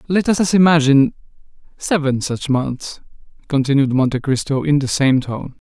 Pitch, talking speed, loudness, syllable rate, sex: 145 Hz, 140 wpm, -17 LUFS, 4.8 syllables/s, male